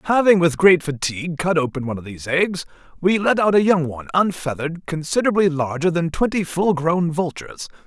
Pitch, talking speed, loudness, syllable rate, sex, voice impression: 165 Hz, 185 wpm, -19 LUFS, 5.9 syllables/s, male, very masculine, very adult-like, old, tensed, powerful, bright, soft, clear, fluent, slightly raspy, very cool, very intellectual, very sincere, slightly calm, very mature, friendly, reassuring, very unique, elegant, very wild, sweet, very lively, intense